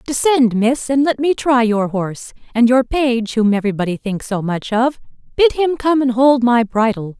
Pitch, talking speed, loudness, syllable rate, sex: 245 Hz, 190 wpm, -16 LUFS, 4.8 syllables/s, female